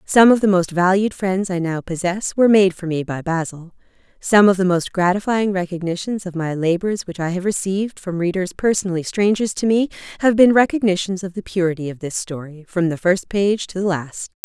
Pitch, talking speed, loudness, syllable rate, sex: 185 Hz, 210 wpm, -19 LUFS, 5.5 syllables/s, female